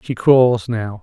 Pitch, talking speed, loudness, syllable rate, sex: 115 Hz, 175 wpm, -15 LUFS, 3.2 syllables/s, male